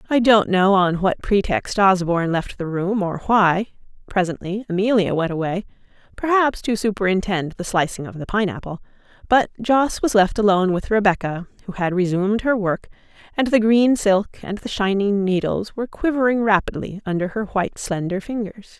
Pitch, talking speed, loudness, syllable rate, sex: 200 Hz, 170 wpm, -20 LUFS, 5.2 syllables/s, female